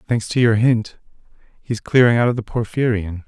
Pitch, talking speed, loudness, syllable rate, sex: 115 Hz, 185 wpm, -18 LUFS, 5.2 syllables/s, male